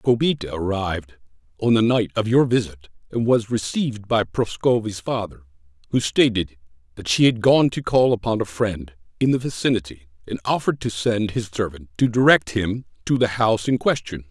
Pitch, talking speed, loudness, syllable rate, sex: 110 Hz, 175 wpm, -21 LUFS, 5.3 syllables/s, male